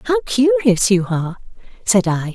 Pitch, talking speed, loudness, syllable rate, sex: 205 Hz, 155 wpm, -16 LUFS, 4.6 syllables/s, female